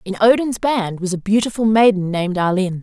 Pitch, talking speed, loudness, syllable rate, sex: 205 Hz, 190 wpm, -17 LUFS, 5.6 syllables/s, female